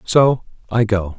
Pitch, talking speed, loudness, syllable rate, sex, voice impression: 110 Hz, 150 wpm, -18 LUFS, 3.6 syllables/s, male, masculine, adult-like, slightly fluent, cool, slightly intellectual, slightly elegant